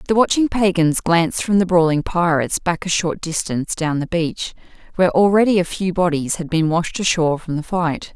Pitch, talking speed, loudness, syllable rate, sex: 170 Hz, 200 wpm, -18 LUFS, 5.3 syllables/s, female